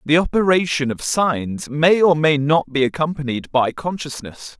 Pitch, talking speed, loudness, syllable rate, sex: 150 Hz, 155 wpm, -18 LUFS, 4.5 syllables/s, male